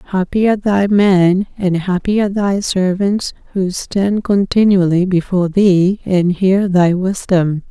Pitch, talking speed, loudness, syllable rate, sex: 190 Hz, 140 wpm, -14 LUFS, 4.1 syllables/s, female